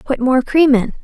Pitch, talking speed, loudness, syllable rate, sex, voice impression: 265 Hz, 230 wpm, -14 LUFS, 4.8 syllables/s, female, feminine, young, cute, friendly, kind